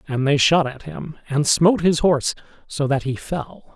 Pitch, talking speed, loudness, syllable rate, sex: 150 Hz, 210 wpm, -19 LUFS, 4.8 syllables/s, male